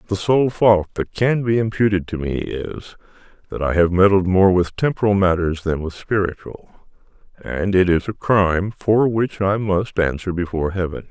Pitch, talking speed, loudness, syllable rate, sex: 95 Hz, 180 wpm, -19 LUFS, 4.7 syllables/s, male